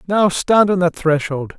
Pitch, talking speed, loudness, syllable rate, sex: 175 Hz, 190 wpm, -16 LUFS, 4.2 syllables/s, male